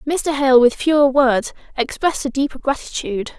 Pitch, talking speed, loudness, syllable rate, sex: 270 Hz, 160 wpm, -17 LUFS, 5.4 syllables/s, female